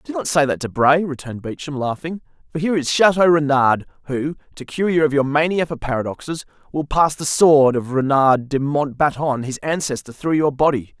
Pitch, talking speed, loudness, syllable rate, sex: 145 Hz, 190 wpm, -19 LUFS, 5.4 syllables/s, male